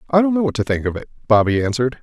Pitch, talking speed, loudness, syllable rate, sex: 130 Hz, 295 wpm, -18 LUFS, 7.9 syllables/s, male